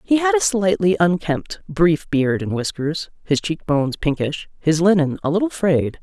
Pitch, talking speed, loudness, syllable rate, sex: 170 Hz, 180 wpm, -19 LUFS, 4.5 syllables/s, female